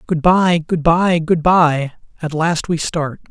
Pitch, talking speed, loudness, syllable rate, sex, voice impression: 165 Hz, 180 wpm, -16 LUFS, 3.6 syllables/s, male, masculine, adult-like, thick, tensed, bright, soft, raspy, refreshing, friendly, wild, kind, modest